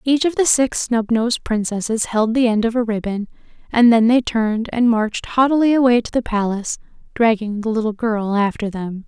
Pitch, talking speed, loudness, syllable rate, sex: 230 Hz, 190 wpm, -18 LUFS, 5.4 syllables/s, female